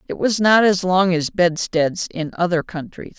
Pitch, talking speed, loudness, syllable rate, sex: 180 Hz, 190 wpm, -18 LUFS, 4.4 syllables/s, female